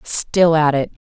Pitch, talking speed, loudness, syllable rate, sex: 160 Hz, 165 wpm, -16 LUFS, 3.6 syllables/s, female